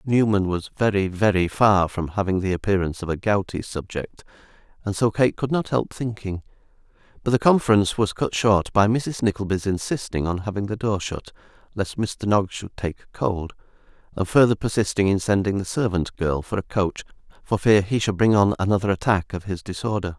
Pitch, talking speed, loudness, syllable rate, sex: 100 Hz, 185 wpm, -22 LUFS, 5.3 syllables/s, male